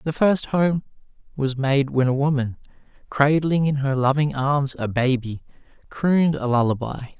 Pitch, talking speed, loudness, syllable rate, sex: 140 Hz, 150 wpm, -21 LUFS, 4.5 syllables/s, male